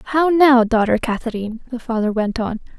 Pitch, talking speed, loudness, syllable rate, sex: 240 Hz, 170 wpm, -18 LUFS, 5.3 syllables/s, female